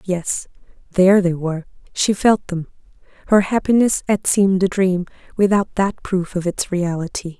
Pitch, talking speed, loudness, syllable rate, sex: 185 Hz, 155 wpm, -18 LUFS, 4.8 syllables/s, female